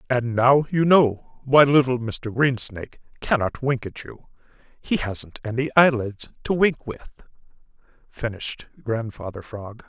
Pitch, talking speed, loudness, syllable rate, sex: 125 Hz, 135 wpm, -21 LUFS, 4.1 syllables/s, male